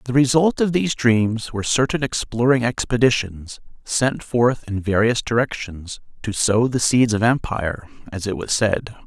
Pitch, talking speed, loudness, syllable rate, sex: 115 Hz, 160 wpm, -20 LUFS, 4.7 syllables/s, male